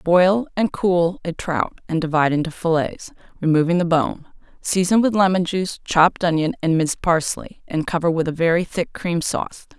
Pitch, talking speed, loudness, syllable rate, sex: 170 Hz, 180 wpm, -20 LUFS, 5.2 syllables/s, female